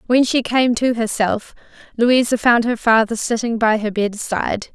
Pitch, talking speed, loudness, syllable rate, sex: 230 Hz, 165 wpm, -17 LUFS, 4.6 syllables/s, female